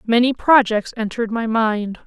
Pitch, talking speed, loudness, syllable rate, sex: 230 Hz, 145 wpm, -18 LUFS, 4.8 syllables/s, female